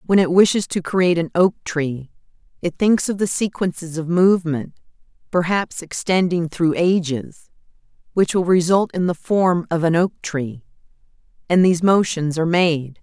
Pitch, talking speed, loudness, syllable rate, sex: 170 Hz, 155 wpm, -19 LUFS, 4.8 syllables/s, female